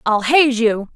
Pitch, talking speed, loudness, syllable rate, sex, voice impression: 240 Hz, 190 wpm, -15 LUFS, 3.7 syllables/s, female, feminine, slightly young, soft, cute, calm, friendly, slightly kind